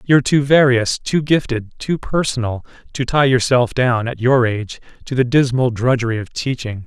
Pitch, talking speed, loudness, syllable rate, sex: 125 Hz, 175 wpm, -17 LUFS, 5.0 syllables/s, male